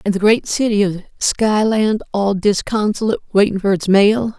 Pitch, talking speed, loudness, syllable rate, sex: 205 Hz, 165 wpm, -16 LUFS, 5.0 syllables/s, female